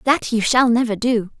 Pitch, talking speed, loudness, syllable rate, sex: 235 Hz, 215 wpm, -17 LUFS, 4.9 syllables/s, female